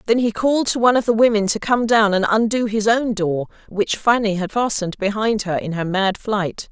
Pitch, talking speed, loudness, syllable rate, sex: 215 Hz, 230 wpm, -18 LUFS, 5.4 syllables/s, female